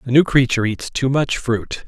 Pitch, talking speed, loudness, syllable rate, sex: 125 Hz, 225 wpm, -18 LUFS, 5.1 syllables/s, male